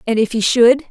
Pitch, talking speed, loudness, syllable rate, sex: 235 Hz, 265 wpm, -14 LUFS, 5.5 syllables/s, female